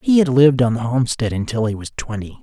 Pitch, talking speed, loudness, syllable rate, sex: 125 Hz, 250 wpm, -18 LUFS, 6.6 syllables/s, male